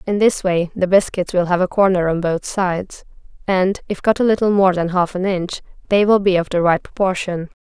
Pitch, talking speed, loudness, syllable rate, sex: 185 Hz, 230 wpm, -17 LUFS, 5.4 syllables/s, female